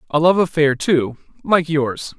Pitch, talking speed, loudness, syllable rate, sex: 155 Hz, 135 wpm, -17 LUFS, 4.1 syllables/s, male